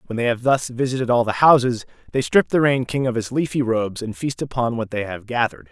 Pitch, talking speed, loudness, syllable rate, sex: 120 Hz, 250 wpm, -20 LUFS, 6.1 syllables/s, male